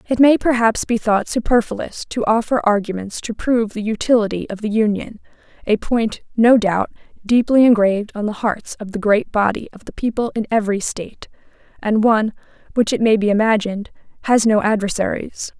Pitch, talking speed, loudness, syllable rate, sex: 220 Hz, 175 wpm, -18 LUFS, 5.5 syllables/s, female